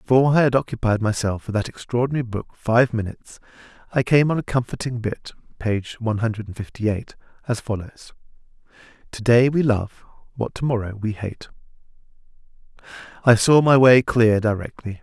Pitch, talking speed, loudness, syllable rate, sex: 115 Hz, 160 wpm, -21 LUFS, 5.0 syllables/s, male